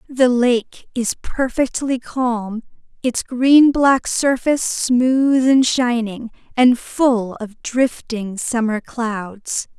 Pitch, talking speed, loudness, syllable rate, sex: 245 Hz, 110 wpm, -18 LUFS, 2.8 syllables/s, female